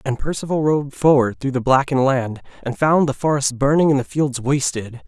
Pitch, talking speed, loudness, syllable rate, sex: 135 Hz, 200 wpm, -18 LUFS, 5.3 syllables/s, male